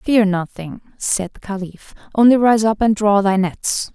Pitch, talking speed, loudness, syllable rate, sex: 205 Hz, 185 wpm, -17 LUFS, 4.2 syllables/s, female